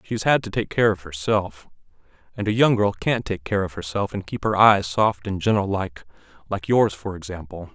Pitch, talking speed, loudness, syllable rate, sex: 95 Hz, 215 wpm, -22 LUFS, 5.3 syllables/s, male